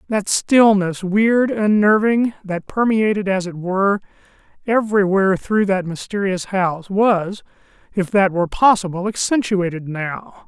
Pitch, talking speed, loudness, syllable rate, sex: 200 Hz, 120 wpm, -18 LUFS, 4.5 syllables/s, male